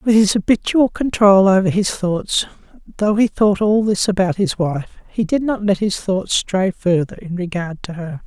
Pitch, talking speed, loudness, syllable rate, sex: 195 Hz, 195 wpm, -17 LUFS, 4.5 syllables/s, female